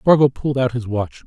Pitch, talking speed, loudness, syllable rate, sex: 125 Hz, 235 wpm, -19 LUFS, 5.8 syllables/s, male